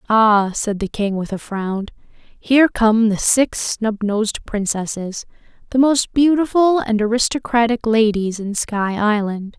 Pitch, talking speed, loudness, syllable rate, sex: 220 Hz, 130 wpm, -18 LUFS, 4.2 syllables/s, female